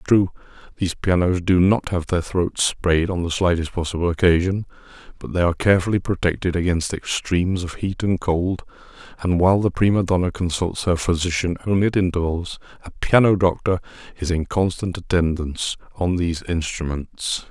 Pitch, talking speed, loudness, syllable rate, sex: 90 Hz, 160 wpm, -21 LUFS, 5.4 syllables/s, male